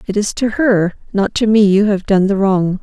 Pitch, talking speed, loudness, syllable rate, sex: 200 Hz, 255 wpm, -14 LUFS, 4.8 syllables/s, female